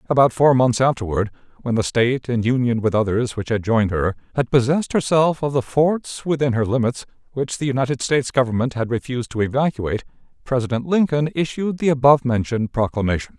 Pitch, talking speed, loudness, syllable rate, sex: 125 Hz, 180 wpm, -20 LUFS, 6.1 syllables/s, male